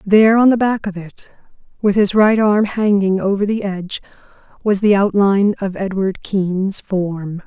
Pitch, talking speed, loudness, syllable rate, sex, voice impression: 200 Hz, 170 wpm, -16 LUFS, 4.7 syllables/s, female, very feminine, very adult-like, very middle-aged, very thin, very relaxed, very weak, slightly dark, very soft, muffled, fluent, cute, slightly cool, very intellectual, refreshing, very sincere, very calm, very friendly, very reassuring, very unique, very elegant, slightly wild, very sweet, slightly lively, very kind, very modest, slightly light